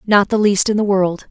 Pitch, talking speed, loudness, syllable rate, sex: 200 Hz, 275 wpm, -15 LUFS, 5.0 syllables/s, female